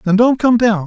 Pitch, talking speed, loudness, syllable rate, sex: 220 Hz, 275 wpm, -13 LUFS, 5.3 syllables/s, male